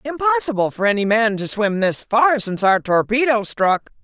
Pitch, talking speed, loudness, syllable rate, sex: 220 Hz, 180 wpm, -18 LUFS, 5.1 syllables/s, female